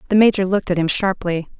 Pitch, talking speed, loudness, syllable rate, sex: 190 Hz, 225 wpm, -18 LUFS, 6.9 syllables/s, female